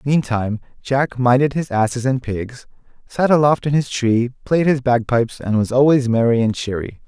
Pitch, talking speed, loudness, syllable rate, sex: 125 Hz, 180 wpm, -18 LUFS, 5.0 syllables/s, male